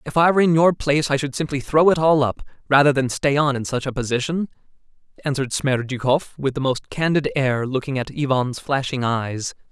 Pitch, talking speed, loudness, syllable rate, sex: 140 Hz, 205 wpm, -20 LUFS, 5.6 syllables/s, male